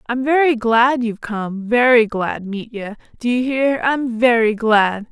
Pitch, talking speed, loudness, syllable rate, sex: 235 Hz, 165 wpm, -17 LUFS, 4.0 syllables/s, female